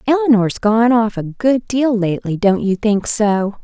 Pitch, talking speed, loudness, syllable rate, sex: 220 Hz, 180 wpm, -16 LUFS, 4.3 syllables/s, female